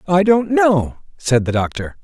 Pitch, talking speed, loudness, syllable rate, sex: 165 Hz, 175 wpm, -16 LUFS, 4.3 syllables/s, male